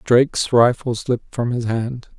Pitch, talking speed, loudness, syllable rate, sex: 120 Hz, 165 wpm, -19 LUFS, 4.5 syllables/s, male